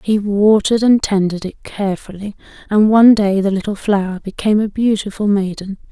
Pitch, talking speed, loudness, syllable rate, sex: 205 Hz, 160 wpm, -15 LUFS, 5.6 syllables/s, female